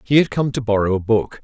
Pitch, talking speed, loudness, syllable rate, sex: 115 Hz, 295 wpm, -18 LUFS, 6.0 syllables/s, male